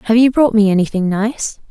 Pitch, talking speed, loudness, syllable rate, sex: 220 Hz, 210 wpm, -14 LUFS, 5.6 syllables/s, female